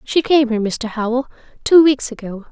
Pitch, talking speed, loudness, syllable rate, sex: 250 Hz, 190 wpm, -16 LUFS, 5.4 syllables/s, female